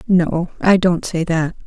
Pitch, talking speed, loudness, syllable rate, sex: 170 Hz, 180 wpm, -17 LUFS, 3.7 syllables/s, female